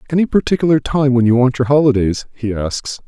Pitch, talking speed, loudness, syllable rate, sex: 130 Hz, 195 wpm, -15 LUFS, 6.0 syllables/s, male